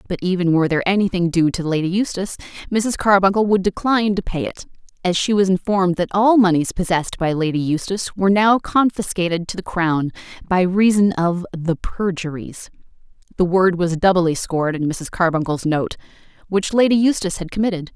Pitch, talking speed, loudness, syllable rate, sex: 185 Hz, 165 wpm, -18 LUFS, 5.8 syllables/s, female